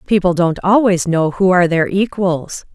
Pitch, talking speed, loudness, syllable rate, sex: 180 Hz, 175 wpm, -15 LUFS, 4.7 syllables/s, female